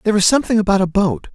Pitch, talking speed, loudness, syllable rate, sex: 200 Hz, 265 wpm, -16 LUFS, 8.3 syllables/s, male